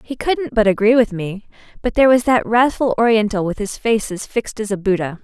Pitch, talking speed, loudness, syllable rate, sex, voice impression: 220 Hz, 230 wpm, -17 LUFS, 5.7 syllables/s, female, feminine, adult-like, tensed, powerful, clear, fluent, intellectual, friendly, lively, slightly sharp